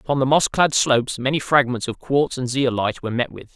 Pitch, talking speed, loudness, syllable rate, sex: 130 Hz, 235 wpm, -20 LUFS, 6.0 syllables/s, male